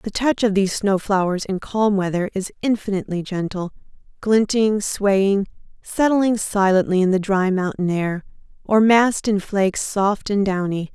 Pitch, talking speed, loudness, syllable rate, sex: 200 Hz, 150 wpm, -20 LUFS, 4.6 syllables/s, female